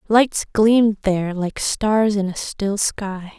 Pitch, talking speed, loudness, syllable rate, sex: 205 Hz, 160 wpm, -19 LUFS, 3.6 syllables/s, female